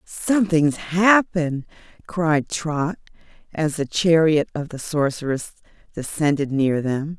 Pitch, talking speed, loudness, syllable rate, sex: 155 Hz, 110 wpm, -21 LUFS, 3.9 syllables/s, female